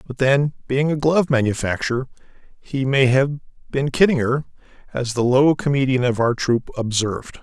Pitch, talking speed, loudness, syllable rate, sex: 130 Hz, 160 wpm, -19 LUFS, 5.1 syllables/s, male